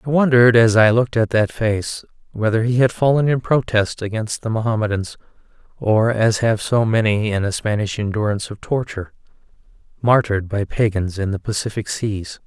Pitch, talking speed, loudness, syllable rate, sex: 110 Hz, 170 wpm, -18 LUFS, 5.4 syllables/s, male